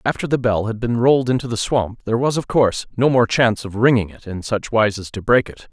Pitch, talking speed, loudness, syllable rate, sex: 115 Hz, 275 wpm, -18 LUFS, 6.1 syllables/s, male